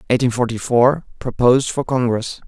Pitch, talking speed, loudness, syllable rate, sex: 125 Hz, 120 wpm, -17 LUFS, 7.4 syllables/s, male